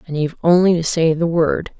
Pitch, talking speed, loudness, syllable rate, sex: 165 Hz, 235 wpm, -16 LUFS, 5.9 syllables/s, female